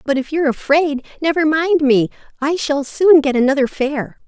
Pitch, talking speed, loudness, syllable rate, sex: 290 Hz, 185 wpm, -16 LUFS, 5.0 syllables/s, female